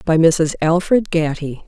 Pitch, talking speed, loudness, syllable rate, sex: 165 Hz, 145 wpm, -17 LUFS, 4.1 syllables/s, female